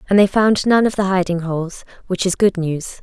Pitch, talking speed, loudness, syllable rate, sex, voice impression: 190 Hz, 240 wpm, -17 LUFS, 5.3 syllables/s, female, very feminine, young, very thin, tensed, powerful, bright, hard, very clear, very fluent, slightly raspy, very cute, intellectual, very refreshing, sincere, very calm, very friendly, very reassuring, very unique, very elegant, slightly wild, very sweet, lively, kind, slightly sharp